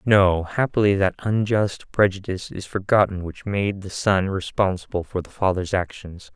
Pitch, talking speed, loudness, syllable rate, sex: 95 Hz, 150 wpm, -22 LUFS, 4.7 syllables/s, male